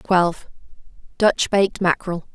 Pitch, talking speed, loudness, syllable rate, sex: 185 Hz, 75 wpm, -20 LUFS, 5.0 syllables/s, female